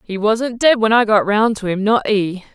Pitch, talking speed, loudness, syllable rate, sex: 215 Hz, 260 wpm, -16 LUFS, 4.6 syllables/s, female